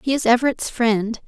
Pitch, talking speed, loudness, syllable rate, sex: 235 Hz, 190 wpm, -19 LUFS, 5.2 syllables/s, female